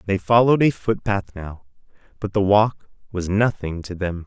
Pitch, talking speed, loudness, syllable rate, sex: 100 Hz, 170 wpm, -20 LUFS, 4.8 syllables/s, male